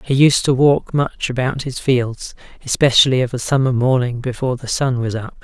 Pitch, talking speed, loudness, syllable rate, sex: 125 Hz, 200 wpm, -17 LUFS, 5.2 syllables/s, male